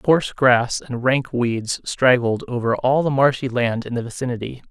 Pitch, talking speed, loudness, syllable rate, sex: 125 Hz, 180 wpm, -20 LUFS, 4.6 syllables/s, male